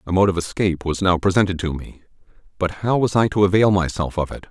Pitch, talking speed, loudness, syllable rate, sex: 90 Hz, 240 wpm, -19 LUFS, 6.3 syllables/s, male